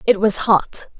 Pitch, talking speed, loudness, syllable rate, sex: 205 Hz, 180 wpm, -17 LUFS, 3.9 syllables/s, female